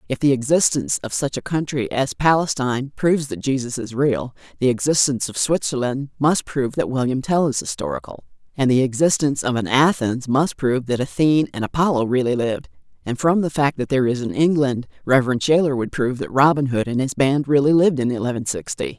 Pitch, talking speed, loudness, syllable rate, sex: 135 Hz, 200 wpm, -20 LUFS, 6.0 syllables/s, female